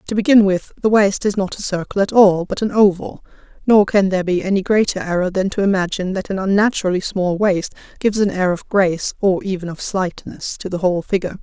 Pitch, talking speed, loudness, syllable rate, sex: 190 Hz, 220 wpm, -17 LUFS, 6.1 syllables/s, female